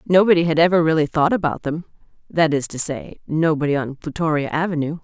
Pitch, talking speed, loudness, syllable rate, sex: 160 Hz, 165 wpm, -19 LUFS, 5.9 syllables/s, female